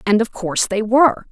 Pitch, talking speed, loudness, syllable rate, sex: 220 Hz, 230 wpm, -17 LUFS, 6.0 syllables/s, female